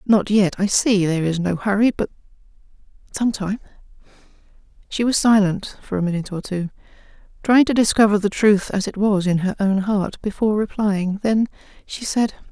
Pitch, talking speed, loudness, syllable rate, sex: 200 Hz, 165 wpm, -19 LUFS, 5.4 syllables/s, female